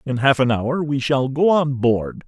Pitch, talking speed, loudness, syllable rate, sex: 135 Hz, 240 wpm, -19 LUFS, 4.2 syllables/s, male